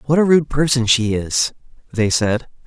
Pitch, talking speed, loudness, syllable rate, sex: 125 Hz, 180 wpm, -17 LUFS, 4.6 syllables/s, male